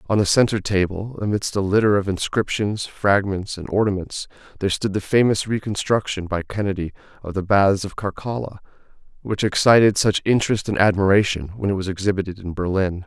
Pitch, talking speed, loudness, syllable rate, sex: 100 Hz, 165 wpm, -20 LUFS, 5.8 syllables/s, male